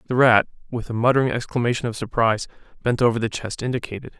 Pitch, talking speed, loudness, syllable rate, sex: 120 Hz, 185 wpm, -22 LUFS, 7.1 syllables/s, male